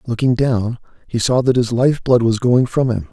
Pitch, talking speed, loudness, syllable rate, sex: 120 Hz, 230 wpm, -16 LUFS, 4.8 syllables/s, male